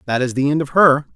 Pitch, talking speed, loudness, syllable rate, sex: 145 Hz, 310 wpm, -16 LUFS, 6.4 syllables/s, male